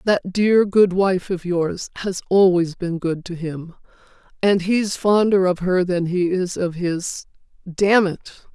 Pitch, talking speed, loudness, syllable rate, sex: 185 Hz, 170 wpm, -19 LUFS, 3.9 syllables/s, female